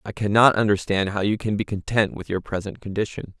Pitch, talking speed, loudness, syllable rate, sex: 100 Hz, 210 wpm, -22 LUFS, 5.8 syllables/s, male